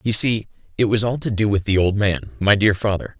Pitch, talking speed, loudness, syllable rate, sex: 105 Hz, 265 wpm, -19 LUFS, 5.5 syllables/s, male